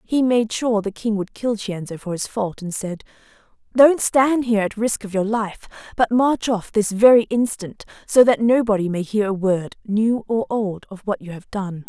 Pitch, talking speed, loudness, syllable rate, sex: 215 Hz, 210 wpm, -20 LUFS, 4.6 syllables/s, female